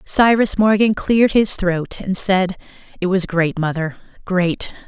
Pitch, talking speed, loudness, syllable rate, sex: 190 Hz, 150 wpm, -17 LUFS, 4.1 syllables/s, female